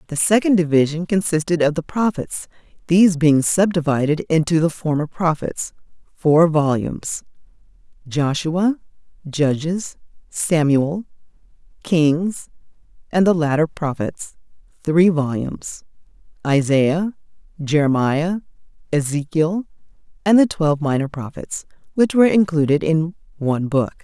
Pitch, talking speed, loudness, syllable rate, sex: 160 Hz, 90 wpm, -19 LUFS, 3.8 syllables/s, female